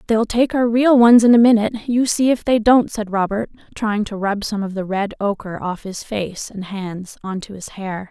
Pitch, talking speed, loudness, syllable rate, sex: 215 Hz, 235 wpm, -18 LUFS, 4.8 syllables/s, female